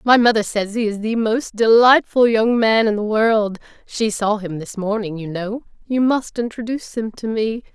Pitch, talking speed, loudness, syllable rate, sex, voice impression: 220 Hz, 200 wpm, -18 LUFS, 4.7 syllables/s, female, slightly feminine, slightly adult-like, slightly fluent, calm, slightly unique